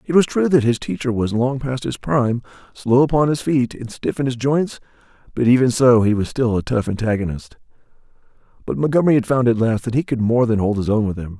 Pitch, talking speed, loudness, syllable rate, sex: 120 Hz, 235 wpm, -18 LUFS, 5.9 syllables/s, male